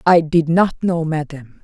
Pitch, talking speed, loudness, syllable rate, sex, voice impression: 160 Hz, 185 wpm, -17 LUFS, 4.2 syllables/s, female, slightly feminine, adult-like, slightly cool, calm, elegant